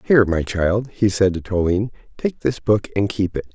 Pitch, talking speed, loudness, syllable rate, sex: 100 Hz, 220 wpm, -20 LUFS, 5.1 syllables/s, male